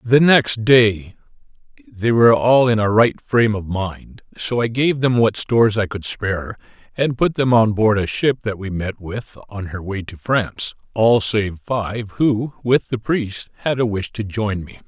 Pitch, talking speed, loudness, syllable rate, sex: 110 Hz, 200 wpm, -18 LUFS, 4.3 syllables/s, male